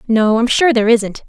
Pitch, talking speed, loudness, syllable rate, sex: 230 Hz, 235 wpm, -13 LUFS, 5.5 syllables/s, female